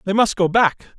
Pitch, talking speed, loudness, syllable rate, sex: 200 Hz, 245 wpm, -17 LUFS, 5.3 syllables/s, male